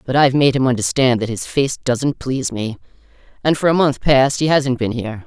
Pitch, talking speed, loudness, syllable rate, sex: 130 Hz, 230 wpm, -17 LUFS, 5.6 syllables/s, female